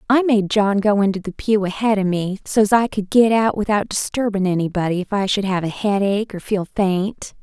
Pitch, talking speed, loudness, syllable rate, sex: 200 Hz, 220 wpm, -19 LUFS, 5.2 syllables/s, female